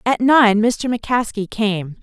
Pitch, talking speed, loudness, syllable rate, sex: 225 Hz, 150 wpm, -17 LUFS, 4.3 syllables/s, female